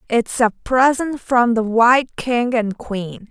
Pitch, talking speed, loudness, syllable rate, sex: 235 Hz, 165 wpm, -17 LUFS, 3.7 syllables/s, female